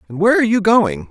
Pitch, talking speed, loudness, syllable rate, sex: 180 Hz, 270 wpm, -14 LUFS, 7.5 syllables/s, male